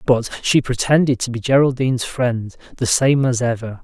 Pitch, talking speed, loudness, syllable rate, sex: 125 Hz, 170 wpm, -18 LUFS, 5.0 syllables/s, male